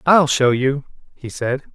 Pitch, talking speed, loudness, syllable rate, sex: 135 Hz, 170 wpm, -18 LUFS, 4.0 syllables/s, male